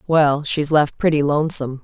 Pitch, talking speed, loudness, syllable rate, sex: 150 Hz, 165 wpm, -18 LUFS, 5.4 syllables/s, female